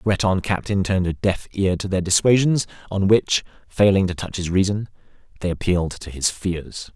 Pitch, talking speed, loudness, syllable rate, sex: 95 Hz, 190 wpm, -21 LUFS, 5.5 syllables/s, male